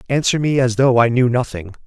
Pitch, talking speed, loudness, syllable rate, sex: 125 Hz, 225 wpm, -16 LUFS, 5.6 syllables/s, male